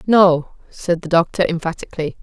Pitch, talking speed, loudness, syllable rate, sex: 170 Hz, 135 wpm, -18 LUFS, 5.2 syllables/s, female